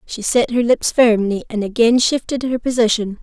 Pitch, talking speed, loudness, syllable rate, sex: 230 Hz, 185 wpm, -16 LUFS, 5.0 syllables/s, female